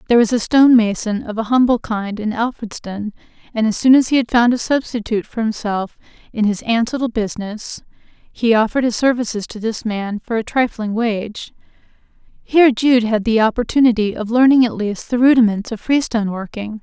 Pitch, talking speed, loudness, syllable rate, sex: 225 Hz, 185 wpm, -17 LUFS, 5.5 syllables/s, female